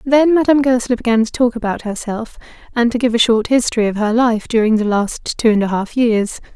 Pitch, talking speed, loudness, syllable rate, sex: 230 Hz, 230 wpm, -16 LUFS, 5.7 syllables/s, female